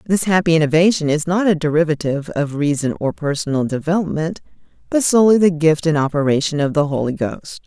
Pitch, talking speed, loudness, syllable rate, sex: 160 Hz, 170 wpm, -17 LUFS, 6.0 syllables/s, female